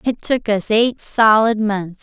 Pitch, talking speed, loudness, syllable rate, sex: 215 Hz, 180 wpm, -16 LUFS, 3.6 syllables/s, female